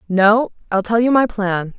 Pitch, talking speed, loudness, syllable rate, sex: 210 Hz, 200 wpm, -16 LUFS, 4.3 syllables/s, female